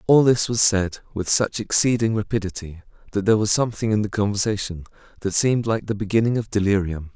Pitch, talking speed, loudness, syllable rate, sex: 105 Hz, 185 wpm, -21 LUFS, 6.1 syllables/s, male